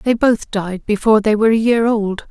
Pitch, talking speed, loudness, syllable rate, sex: 215 Hz, 235 wpm, -16 LUFS, 5.3 syllables/s, female